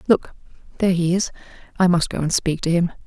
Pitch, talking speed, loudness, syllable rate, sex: 175 Hz, 175 wpm, -20 LUFS, 6.4 syllables/s, female